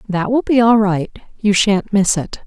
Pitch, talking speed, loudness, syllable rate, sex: 205 Hz, 220 wpm, -15 LUFS, 4.3 syllables/s, female